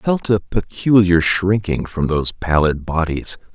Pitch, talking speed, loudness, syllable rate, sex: 90 Hz, 150 wpm, -17 LUFS, 4.5 syllables/s, male